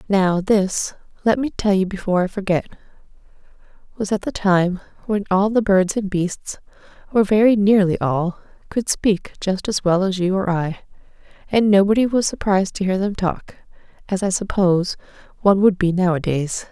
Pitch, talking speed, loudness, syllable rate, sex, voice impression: 195 Hz, 170 wpm, -19 LUFS, 5.0 syllables/s, female, feminine, adult-like, slightly cute, friendly, slightly kind